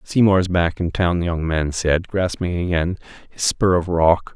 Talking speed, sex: 195 wpm, male